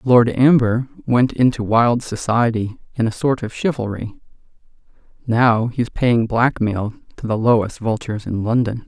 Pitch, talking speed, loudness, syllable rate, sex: 115 Hz, 140 wpm, -18 LUFS, 4.4 syllables/s, male